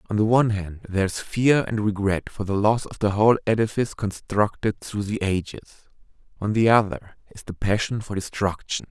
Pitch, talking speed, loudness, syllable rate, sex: 105 Hz, 190 wpm, -23 LUFS, 5.6 syllables/s, male